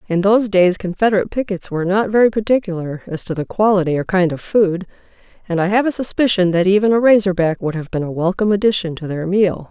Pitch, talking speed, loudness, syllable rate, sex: 190 Hz, 225 wpm, -17 LUFS, 6.4 syllables/s, female